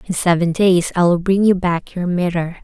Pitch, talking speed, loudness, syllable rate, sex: 180 Hz, 230 wpm, -16 LUFS, 5.0 syllables/s, female